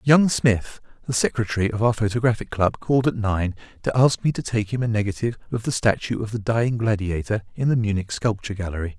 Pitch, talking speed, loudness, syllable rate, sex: 110 Hz, 205 wpm, -22 LUFS, 6.2 syllables/s, male